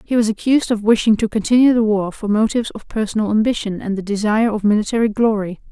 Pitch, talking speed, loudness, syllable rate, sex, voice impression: 215 Hz, 210 wpm, -17 LUFS, 6.7 syllables/s, female, feminine, adult-like, tensed, powerful, slightly hard, fluent, slightly raspy, intellectual, calm, lively, slightly strict, slightly sharp